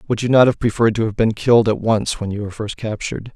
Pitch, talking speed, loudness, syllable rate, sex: 110 Hz, 285 wpm, -18 LUFS, 6.9 syllables/s, male